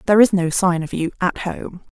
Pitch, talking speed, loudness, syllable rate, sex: 185 Hz, 245 wpm, -19 LUFS, 5.6 syllables/s, female